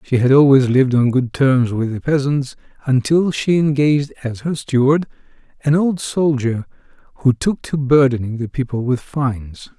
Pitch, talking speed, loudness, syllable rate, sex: 135 Hz, 165 wpm, -17 LUFS, 4.8 syllables/s, male